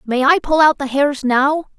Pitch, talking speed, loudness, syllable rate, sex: 285 Hz, 235 wpm, -15 LUFS, 4.3 syllables/s, female